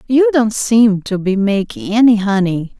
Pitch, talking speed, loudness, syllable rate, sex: 215 Hz, 170 wpm, -14 LUFS, 4.2 syllables/s, female